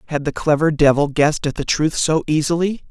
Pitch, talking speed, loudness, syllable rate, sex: 150 Hz, 205 wpm, -18 LUFS, 5.8 syllables/s, male